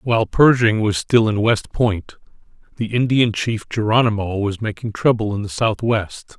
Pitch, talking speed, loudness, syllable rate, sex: 110 Hz, 160 wpm, -18 LUFS, 4.6 syllables/s, male